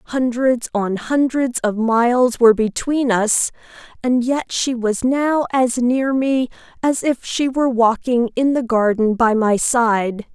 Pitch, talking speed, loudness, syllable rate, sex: 245 Hz, 150 wpm, -18 LUFS, 3.8 syllables/s, female